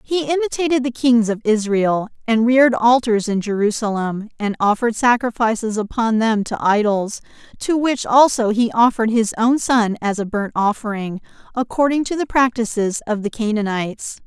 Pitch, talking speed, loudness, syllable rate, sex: 230 Hz, 155 wpm, -18 LUFS, 5.1 syllables/s, female